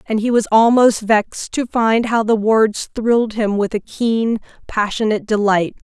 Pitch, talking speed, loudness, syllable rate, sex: 220 Hz, 170 wpm, -16 LUFS, 4.5 syllables/s, female